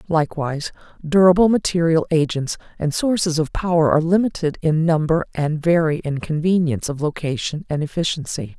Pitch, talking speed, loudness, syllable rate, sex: 160 Hz, 140 wpm, -19 LUFS, 5.6 syllables/s, female